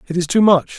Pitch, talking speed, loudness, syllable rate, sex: 175 Hz, 305 wpm, -15 LUFS, 6.3 syllables/s, male